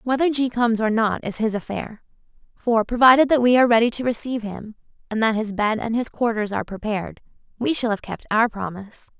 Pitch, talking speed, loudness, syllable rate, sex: 225 Hz, 210 wpm, -21 LUFS, 6.1 syllables/s, female